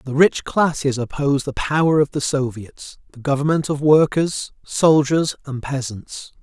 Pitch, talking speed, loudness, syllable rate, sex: 140 Hz, 140 wpm, -19 LUFS, 4.5 syllables/s, male